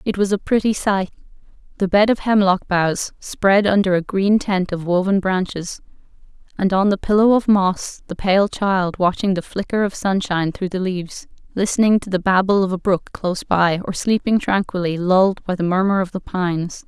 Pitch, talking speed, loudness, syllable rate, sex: 190 Hz, 190 wpm, -18 LUFS, 5.0 syllables/s, female